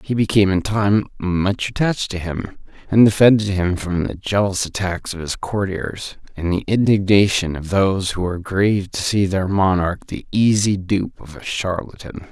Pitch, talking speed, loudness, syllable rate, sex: 95 Hz, 175 wpm, -19 LUFS, 4.9 syllables/s, male